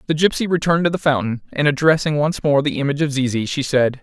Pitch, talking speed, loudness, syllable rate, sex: 145 Hz, 240 wpm, -18 LUFS, 6.7 syllables/s, male